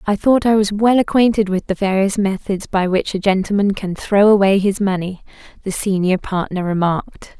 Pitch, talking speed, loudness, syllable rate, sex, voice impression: 195 Hz, 185 wpm, -17 LUFS, 5.1 syllables/s, female, feminine, adult-like, slightly relaxed, slightly weak, soft, slightly raspy, friendly, reassuring, elegant, kind, modest